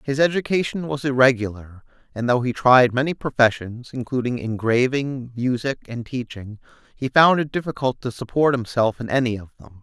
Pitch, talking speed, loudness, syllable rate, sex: 125 Hz, 145 wpm, -21 LUFS, 5.2 syllables/s, male